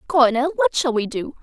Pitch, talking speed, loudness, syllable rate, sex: 280 Hz, 210 wpm, -19 LUFS, 5.8 syllables/s, female